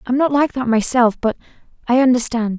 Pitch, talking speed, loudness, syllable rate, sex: 245 Hz, 185 wpm, -17 LUFS, 5.5 syllables/s, female